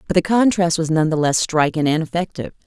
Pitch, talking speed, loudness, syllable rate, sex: 165 Hz, 225 wpm, -18 LUFS, 6.3 syllables/s, female